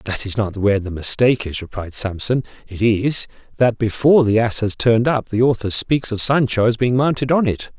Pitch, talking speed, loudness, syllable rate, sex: 115 Hz, 215 wpm, -18 LUFS, 5.4 syllables/s, male